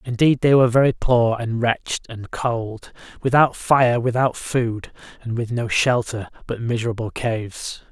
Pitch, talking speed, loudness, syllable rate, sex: 120 Hz, 150 wpm, -20 LUFS, 4.5 syllables/s, male